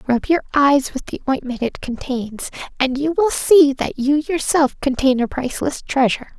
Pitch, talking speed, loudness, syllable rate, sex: 275 Hz, 180 wpm, -18 LUFS, 4.8 syllables/s, female